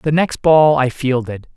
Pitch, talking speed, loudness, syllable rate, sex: 140 Hz, 190 wpm, -15 LUFS, 4.1 syllables/s, male